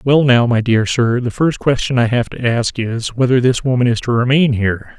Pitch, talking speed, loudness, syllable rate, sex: 125 Hz, 240 wpm, -15 LUFS, 5.1 syllables/s, male